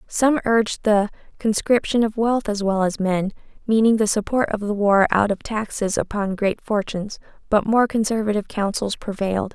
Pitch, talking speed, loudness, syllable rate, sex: 210 Hz, 170 wpm, -21 LUFS, 5.1 syllables/s, female